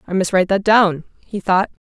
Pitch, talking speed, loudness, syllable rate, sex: 195 Hz, 225 wpm, -16 LUFS, 5.5 syllables/s, female